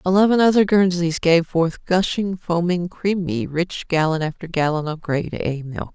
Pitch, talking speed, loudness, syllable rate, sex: 170 Hz, 160 wpm, -20 LUFS, 4.7 syllables/s, female